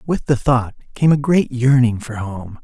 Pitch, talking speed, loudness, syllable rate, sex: 125 Hz, 205 wpm, -17 LUFS, 4.4 syllables/s, male